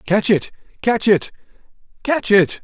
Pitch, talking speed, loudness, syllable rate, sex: 205 Hz, 135 wpm, -17 LUFS, 4.1 syllables/s, male